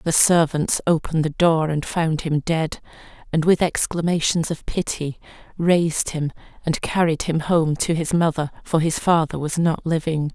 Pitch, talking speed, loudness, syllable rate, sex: 160 Hz, 170 wpm, -21 LUFS, 4.6 syllables/s, female